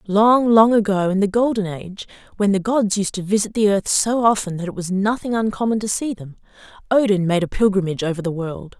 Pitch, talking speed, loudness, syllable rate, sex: 200 Hz, 220 wpm, -19 LUFS, 5.8 syllables/s, female